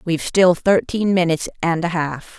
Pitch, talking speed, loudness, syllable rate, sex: 170 Hz, 175 wpm, -18 LUFS, 5.2 syllables/s, female